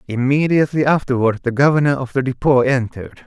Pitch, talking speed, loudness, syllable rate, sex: 135 Hz, 145 wpm, -16 LUFS, 6.1 syllables/s, male